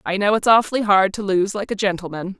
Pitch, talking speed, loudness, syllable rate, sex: 200 Hz, 250 wpm, -19 LUFS, 6.1 syllables/s, female